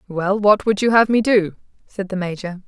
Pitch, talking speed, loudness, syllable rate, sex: 200 Hz, 225 wpm, -17 LUFS, 5.1 syllables/s, female